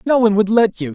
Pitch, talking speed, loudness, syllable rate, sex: 210 Hz, 320 wpm, -15 LUFS, 7.2 syllables/s, male